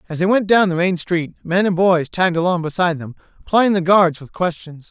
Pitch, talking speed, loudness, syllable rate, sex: 175 Hz, 230 wpm, -17 LUFS, 5.5 syllables/s, male